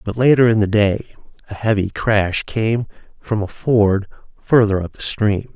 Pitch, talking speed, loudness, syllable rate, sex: 110 Hz, 175 wpm, -17 LUFS, 4.3 syllables/s, male